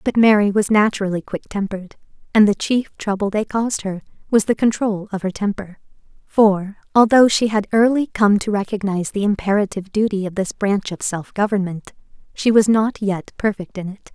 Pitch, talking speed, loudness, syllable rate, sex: 205 Hz, 180 wpm, -18 LUFS, 5.4 syllables/s, female